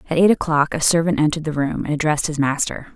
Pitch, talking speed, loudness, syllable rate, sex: 155 Hz, 245 wpm, -19 LUFS, 6.9 syllables/s, female